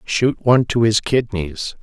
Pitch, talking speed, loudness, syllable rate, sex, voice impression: 110 Hz, 165 wpm, -18 LUFS, 4.4 syllables/s, male, masculine, adult-like, thick, tensed, slightly powerful, clear, halting, calm, mature, friendly, reassuring, wild, kind, slightly modest